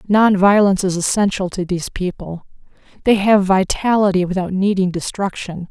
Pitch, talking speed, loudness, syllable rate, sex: 190 Hz, 115 wpm, -17 LUFS, 5.3 syllables/s, female